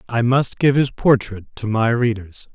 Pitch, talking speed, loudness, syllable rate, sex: 120 Hz, 190 wpm, -18 LUFS, 4.2 syllables/s, male